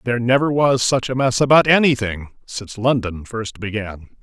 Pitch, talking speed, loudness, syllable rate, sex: 120 Hz, 170 wpm, -18 LUFS, 5.1 syllables/s, male